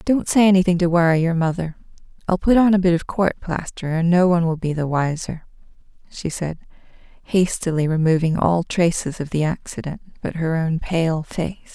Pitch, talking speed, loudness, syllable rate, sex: 170 Hz, 190 wpm, -20 LUFS, 5.2 syllables/s, female